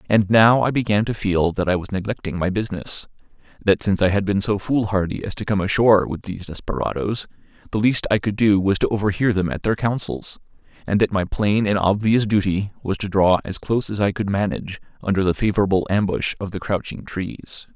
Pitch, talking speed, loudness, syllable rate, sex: 100 Hz, 210 wpm, -21 LUFS, 5.8 syllables/s, male